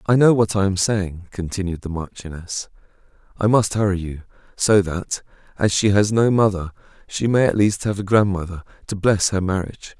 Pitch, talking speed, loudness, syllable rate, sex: 100 Hz, 185 wpm, -20 LUFS, 5.2 syllables/s, male